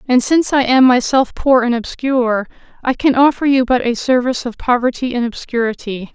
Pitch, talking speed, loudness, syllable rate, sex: 250 Hz, 185 wpm, -15 LUFS, 5.5 syllables/s, female